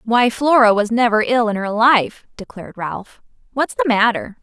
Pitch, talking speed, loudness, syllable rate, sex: 225 Hz, 175 wpm, -16 LUFS, 4.7 syllables/s, female